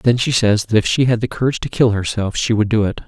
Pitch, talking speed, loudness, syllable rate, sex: 115 Hz, 315 wpm, -17 LUFS, 6.4 syllables/s, male